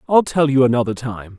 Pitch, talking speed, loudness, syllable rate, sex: 130 Hz, 215 wpm, -17 LUFS, 5.7 syllables/s, male